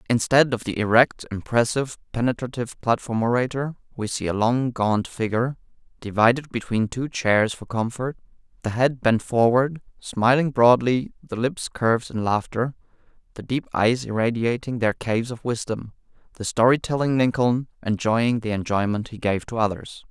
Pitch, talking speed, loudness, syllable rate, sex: 120 Hz, 150 wpm, -23 LUFS, 5.0 syllables/s, male